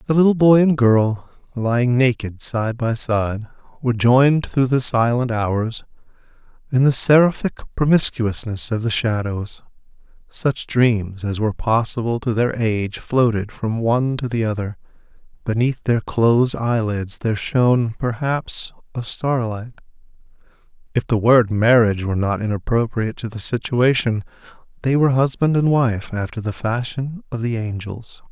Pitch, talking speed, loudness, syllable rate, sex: 120 Hz, 140 wpm, -19 LUFS, 4.6 syllables/s, male